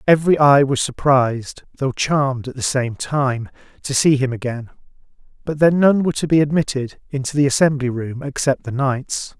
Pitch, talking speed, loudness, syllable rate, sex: 135 Hz, 180 wpm, -18 LUFS, 4.9 syllables/s, male